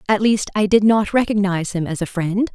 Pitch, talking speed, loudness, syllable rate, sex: 200 Hz, 235 wpm, -18 LUFS, 5.6 syllables/s, female